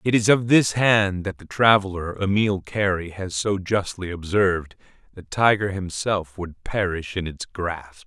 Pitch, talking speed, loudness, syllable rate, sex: 95 Hz, 165 wpm, -22 LUFS, 4.4 syllables/s, male